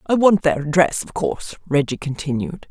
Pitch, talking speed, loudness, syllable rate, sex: 160 Hz, 175 wpm, -19 LUFS, 5.2 syllables/s, female